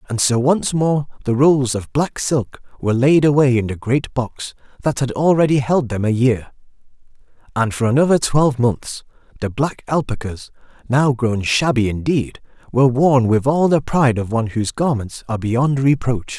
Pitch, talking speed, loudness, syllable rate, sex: 130 Hz, 175 wpm, -18 LUFS, 4.9 syllables/s, male